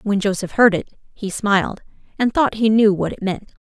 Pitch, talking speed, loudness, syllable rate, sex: 205 Hz, 215 wpm, -18 LUFS, 5.2 syllables/s, female